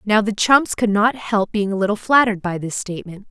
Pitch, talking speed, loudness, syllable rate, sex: 210 Hz, 235 wpm, -18 LUFS, 5.6 syllables/s, female